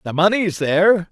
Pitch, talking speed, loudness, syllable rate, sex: 180 Hz, 160 wpm, -17 LUFS, 5.0 syllables/s, male